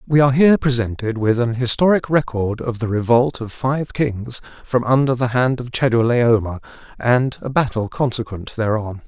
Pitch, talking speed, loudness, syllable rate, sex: 125 Hz, 165 wpm, -18 LUFS, 5.0 syllables/s, male